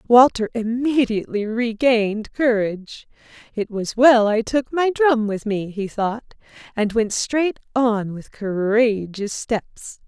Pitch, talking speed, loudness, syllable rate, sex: 225 Hz, 130 wpm, -20 LUFS, 3.8 syllables/s, female